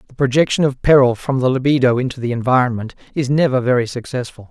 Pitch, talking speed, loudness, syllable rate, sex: 130 Hz, 185 wpm, -17 LUFS, 6.5 syllables/s, male